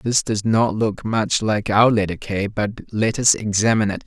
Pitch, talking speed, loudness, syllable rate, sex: 110 Hz, 205 wpm, -19 LUFS, 4.5 syllables/s, male